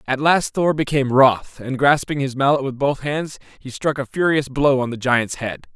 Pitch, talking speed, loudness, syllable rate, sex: 135 Hz, 220 wpm, -19 LUFS, 4.8 syllables/s, male